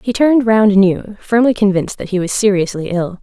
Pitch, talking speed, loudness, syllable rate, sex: 205 Hz, 205 wpm, -14 LUFS, 5.8 syllables/s, female